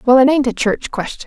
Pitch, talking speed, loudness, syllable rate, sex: 250 Hz, 285 wpm, -16 LUFS, 5.8 syllables/s, female